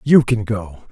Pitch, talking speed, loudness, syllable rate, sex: 110 Hz, 195 wpm, -18 LUFS, 3.9 syllables/s, male